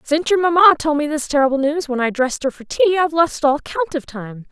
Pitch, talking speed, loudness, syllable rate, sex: 295 Hz, 265 wpm, -17 LUFS, 6.2 syllables/s, female